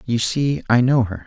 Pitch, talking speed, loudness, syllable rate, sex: 115 Hz, 235 wpm, -18 LUFS, 4.6 syllables/s, male